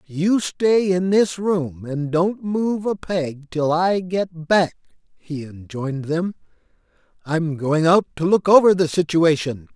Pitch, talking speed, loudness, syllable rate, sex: 170 Hz, 155 wpm, -20 LUFS, 3.7 syllables/s, male